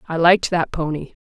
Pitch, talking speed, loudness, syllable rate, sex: 165 Hz, 195 wpm, -19 LUFS, 5.9 syllables/s, female